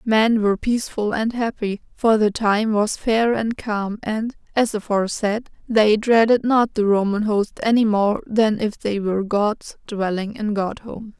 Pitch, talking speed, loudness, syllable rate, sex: 215 Hz, 170 wpm, -20 LUFS, 4.2 syllables/s, female